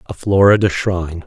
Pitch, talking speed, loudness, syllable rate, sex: 90 Hz, 140 wpm, -15 LUFS, 5.6 syllables/s, male